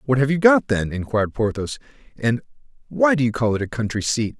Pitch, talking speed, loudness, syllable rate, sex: 125 Hz, 220 wpm, -20 LUFS, 6.0 syllables/s, male